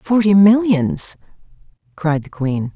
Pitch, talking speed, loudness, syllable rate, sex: 175 Hz, 110 wpm, -16 LUFS, 3.6 syllables/s, female